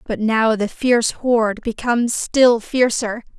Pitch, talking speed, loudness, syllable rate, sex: 230 Hz, 140 wpm, -18 LUFS, 4.1 syllables/s, female